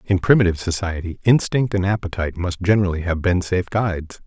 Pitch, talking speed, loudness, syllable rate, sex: 95 Hz, 170 wpm, -20 LUFS, 6.4 syllables/s, male